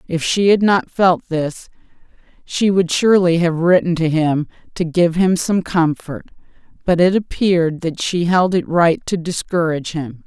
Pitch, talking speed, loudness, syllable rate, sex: 170 Hz, 170 wpm, -17 LUFS, 4.5 syllables/s, female